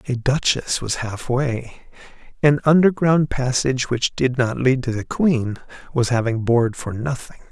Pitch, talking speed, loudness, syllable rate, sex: 130 Hz, 150 wpm, -20 LUFS, 4.4 syllables/s, male